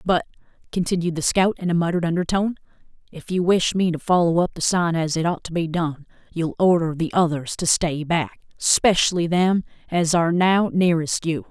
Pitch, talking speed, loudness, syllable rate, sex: 170 Hz, 190 wpm, -21 LUFS, 6.4 syllables/s, female